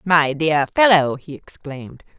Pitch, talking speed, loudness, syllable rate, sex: 155 Hz, 135 wpm, -16 LUFS, 4.2 syllables/s, female